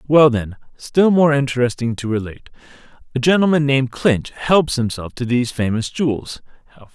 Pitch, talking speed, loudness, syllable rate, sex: 130 Hz, 145 wpm, -18 LUFS, 5.3 syllables/s, male